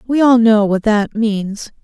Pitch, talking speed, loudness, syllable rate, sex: 220 Hz, 195 wpm, -14 LUFS, 3.8 syllables/s, female